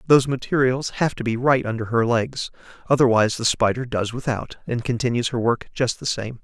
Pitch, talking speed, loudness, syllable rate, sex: 120 Hz, 195 wpm, -22 LUFS, 5.6 syllables/s, male